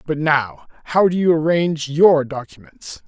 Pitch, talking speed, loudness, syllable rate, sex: 155 Hz, 155 wpm, -17 LUFS, 4.5 syllables/s, male